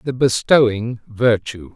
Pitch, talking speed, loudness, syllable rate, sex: 115 Hz, 100 wpm, -17 LUFS, 3.6 syllables/s, male